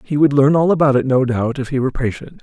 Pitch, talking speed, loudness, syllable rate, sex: 135 Hz, 295 wpm, -16 LUFS, 6.4 syllables/s, male